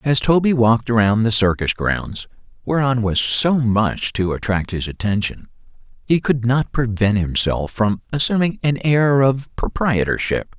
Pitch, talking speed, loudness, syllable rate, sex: 115 Hz, 145 wpm, -18 LUFS, 4.3 syllables/s, male